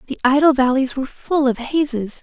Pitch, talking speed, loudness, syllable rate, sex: 265 Hz, 190 wpm, -18 LUFS, 5.5 syllables/s, female